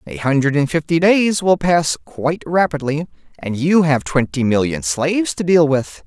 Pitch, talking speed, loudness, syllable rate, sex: 155 Hz, 180 wpm, -17 LUFS, 4.7 syllables/s, male